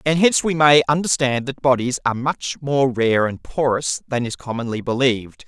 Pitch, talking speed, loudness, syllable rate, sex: 135 Hz, 185 wpm, -19 LUFS, 5.2 syllables/s, male